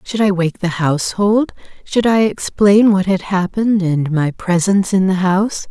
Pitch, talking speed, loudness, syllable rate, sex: 190 Hz, 180 wpm, -15 LUFS, 4.7 syllables/s, female